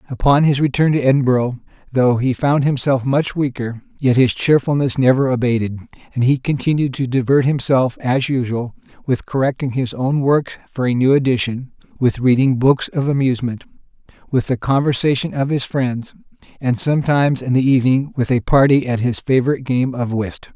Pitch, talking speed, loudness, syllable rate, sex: 130 Hz, 170 wpm, -17 LUFS, 5.4 syllables/s, male